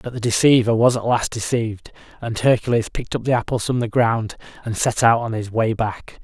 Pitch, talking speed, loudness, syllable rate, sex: 115 Hz, 220 wpm, -19 LUFS, 5.6 syllables/s, male